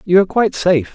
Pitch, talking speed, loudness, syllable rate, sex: 180 Hz, 255 wpm, -15 LUFS, 8.2 syllables/s, male